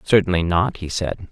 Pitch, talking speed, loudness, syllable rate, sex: 90 Hz, 185 wpm, -20 LUFS, 5.0 syllables/s, male